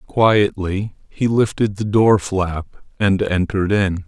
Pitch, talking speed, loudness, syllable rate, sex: 100 Hz, 135 wpm, -18 LUFS, 3.8 syllables/s, male